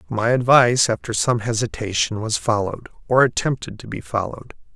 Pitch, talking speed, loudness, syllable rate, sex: 110 Hz, 150 wpm, -20 LUFS, 5.7 syllables/s, male